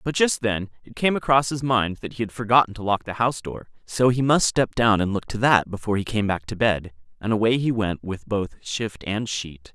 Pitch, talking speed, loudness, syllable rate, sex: 110 Hz, 250 wpm, -23 LUFS, 5.3 syllables/s, male